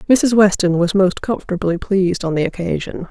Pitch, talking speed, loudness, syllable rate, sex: 190 Hz, 175 wpm, -17 LUFS, 5.5 syllables/s, female